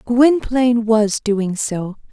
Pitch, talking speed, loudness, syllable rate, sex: 225 Hz, 115 wpm, -17 LUFS, 3.2 syllables/s, female